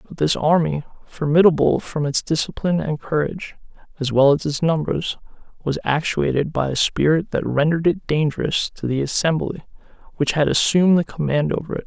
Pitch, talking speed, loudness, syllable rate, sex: 155 Hz, 165 wpm, -20 LUFS, 5.6 syllables/s, male